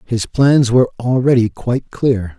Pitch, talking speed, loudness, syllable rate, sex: 120 Hz, 150 wpm, -15 LUFS, 4.6 syllables/s, male